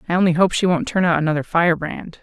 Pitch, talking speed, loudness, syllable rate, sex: 170 Hz, 245 wpm, -18 LUFS, 6.8 syllables/s, female